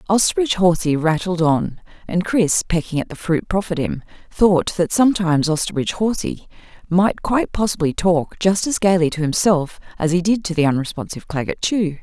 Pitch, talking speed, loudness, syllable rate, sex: 175 Hz, 170 wpm, -19 LUFS, 5.6 syllables/s, female